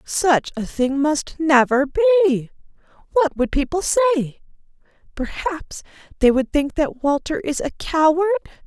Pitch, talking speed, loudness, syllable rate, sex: 310 Hz, 130 wpm, -19 LUFS, 4.6 syllables/s, female